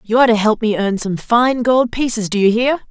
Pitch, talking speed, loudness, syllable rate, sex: 225 Hz, 270 wpm, -15 LUFS, 5.5 syllables/s, female